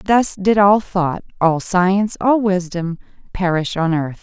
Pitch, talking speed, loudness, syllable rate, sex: 185 Hz, 155 wpm, -17 LUFS, 3.9 syllables/s, female